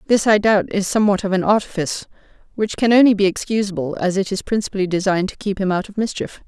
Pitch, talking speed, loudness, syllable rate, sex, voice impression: 200 Hz, 225 wpm, -18 LUFS, 6.7 syllables/s, female, feminine, slightly gender-neutral, very adult-like, very middle-aged, slightly thin, slightly tensed, slightly weak, slightly dark, soft, slightly clear, very fluent, slightly cool, intellectual, refreshing, sincere, slightly calm, slightly friendly, slightly reassuring, unique, elegant, slightly wild, slightly lively, strict, sharp